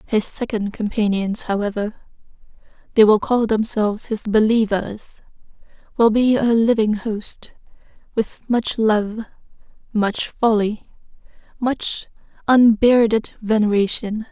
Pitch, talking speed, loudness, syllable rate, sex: 220 Hz, 90 wpm, -19 LUFS, 3.9 syllables/s, female